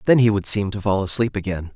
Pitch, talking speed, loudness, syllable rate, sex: 100 Hz, 275 wpm, -20 LUFS, 6.2 syllables/s, male